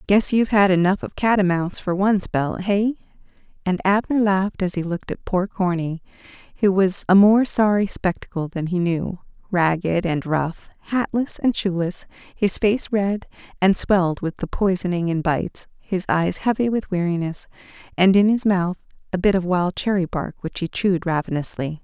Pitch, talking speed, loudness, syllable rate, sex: 185 Hz, 170 wpm, -21 LUFS, 4.9 syllables/s, female